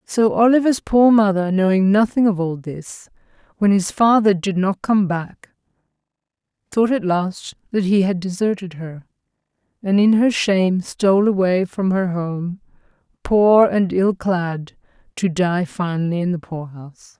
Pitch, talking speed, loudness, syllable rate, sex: 190 Hz, 150 wpm, -18 LUFS, 4.3 syllables/s, female